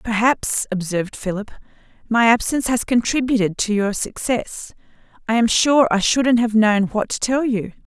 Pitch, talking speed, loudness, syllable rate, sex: 225 Hz, 160 wpm, -19 LUFS, 4.8 syllables/s, female